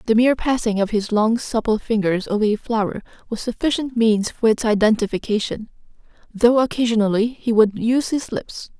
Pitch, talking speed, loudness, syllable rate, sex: 225 Hz, 165 wpm, -19 LUFS, 5.5 syllables/s, female